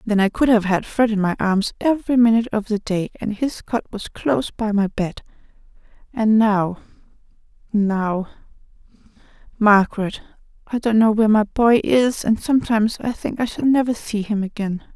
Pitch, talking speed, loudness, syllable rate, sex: 215 Hz, 165 wpm, -19 LUFS, 5.2 syllables/s, female